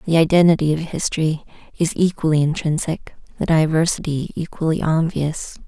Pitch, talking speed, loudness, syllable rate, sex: 160 Hz, 115 wpm, -19 LUFS, 5.3 syllables/s, female